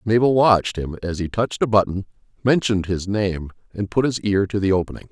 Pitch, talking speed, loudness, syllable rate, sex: 100 Hz, 200 wpm, -20 LUFS, 6.0 syllables/s, male